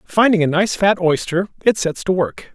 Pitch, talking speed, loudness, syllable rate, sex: 180 Hz, 210 wpm, -17 LUFS, 4.8 syllables/s, male